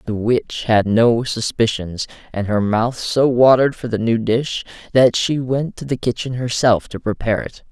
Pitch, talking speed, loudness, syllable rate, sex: 120 Hz, 185 wpm, -18 LUFS, 4.6 syllables/s, male